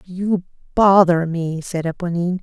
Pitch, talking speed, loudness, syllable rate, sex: 175 Hz, 125 wpm, -18 LUFS, 4.5 syllables/s, female